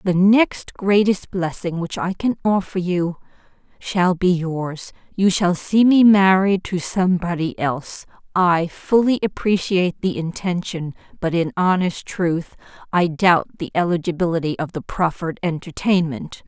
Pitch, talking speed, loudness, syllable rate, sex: 180 Hz, 135 wpm, -19 LUFS, 4.4 syllables/s, female